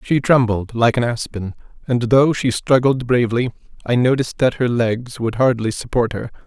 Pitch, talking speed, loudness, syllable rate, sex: 120 Hz, 175 wpm, -18 LUFS, 5.1 syllables/s, male